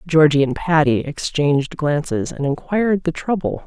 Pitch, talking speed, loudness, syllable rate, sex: 155 Hz, 145 wpm, -19 LUFS, 4.8 syllables/s, female